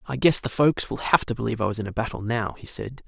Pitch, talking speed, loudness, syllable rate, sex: 120 Hz, 310 wpm, -24 LUFS, 6.7 syllables/s, male